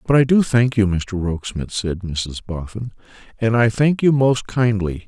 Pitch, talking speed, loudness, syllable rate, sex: 110 Hz, 190 wpm, -19 LUFS, 4.6 syllables/s, male